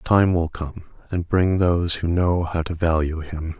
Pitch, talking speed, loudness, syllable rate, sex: 85 Hz, 200 wpm, -22 LUFS, 4.3 syllables/s, male